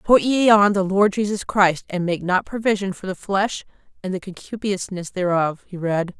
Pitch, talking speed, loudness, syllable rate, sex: 195 Hz, 195 wpm, -20 LUFS, 5.0 syllables/s, female